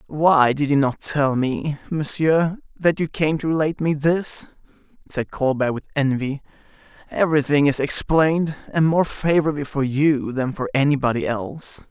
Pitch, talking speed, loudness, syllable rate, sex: 145 Hz, 150 wpm, -20 LUFS, 4.8 syllables/s, male